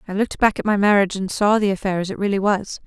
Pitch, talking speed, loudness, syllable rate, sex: 200 Hz, 295 wpm, -19 LUFS, 7.1 syllables/s, female